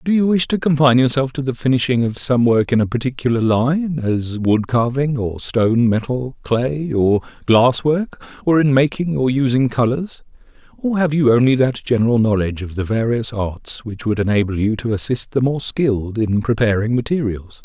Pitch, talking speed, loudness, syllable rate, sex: 125 Hz, 185 wpm, -18 LUFS, 5.0 syllables/s, male